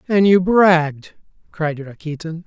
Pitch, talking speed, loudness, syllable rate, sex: 170 Hz, 120 wpm, -16 LUFS, 4.1 syllables/s, male